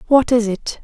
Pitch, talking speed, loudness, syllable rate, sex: 230 Hz, 215 wpm, -17 LUFS, 4.6 syllables/s, female